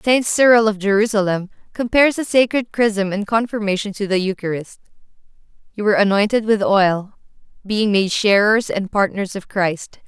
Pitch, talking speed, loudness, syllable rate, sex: 205 Hz, 150 wpm, -17 LUFS, 5.0 syllables/s, female